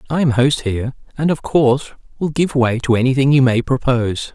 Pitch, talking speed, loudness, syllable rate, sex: 130 Hz, 195 wpm, -16 LUFS, 5.5 syllables/s, male